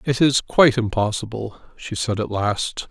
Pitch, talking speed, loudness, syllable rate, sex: 115 Hz, 165 wpm, -20 LUFS, 4.6 syllables/s, male